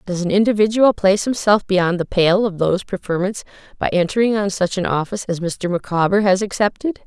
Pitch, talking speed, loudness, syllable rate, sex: 195 Hz, 185 wpm, -18 LUFS, 5.8 syllables/s, female